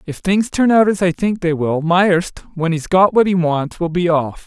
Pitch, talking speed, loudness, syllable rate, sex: 175 Hz, 255 wpm, -16 LUFS, 4.5 syllables/s, male